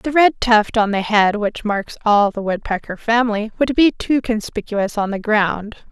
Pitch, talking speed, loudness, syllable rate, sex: 220 Hz, 195 wpm, -18 LUFS, 4.5 syllables/s, female